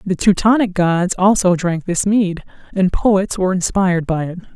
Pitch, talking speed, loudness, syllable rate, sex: 185 Hz, 170 wpm, -16 LUFS, 4.7 syllables/s, female